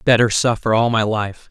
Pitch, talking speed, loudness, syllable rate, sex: 110 Hz, 200 wpm, -17 LUFS, 5.0 syllables/s, male